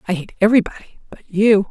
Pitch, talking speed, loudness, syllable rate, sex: 205 Hz, 140 wpm, -17 LUFS, 6.7 syllables/s, female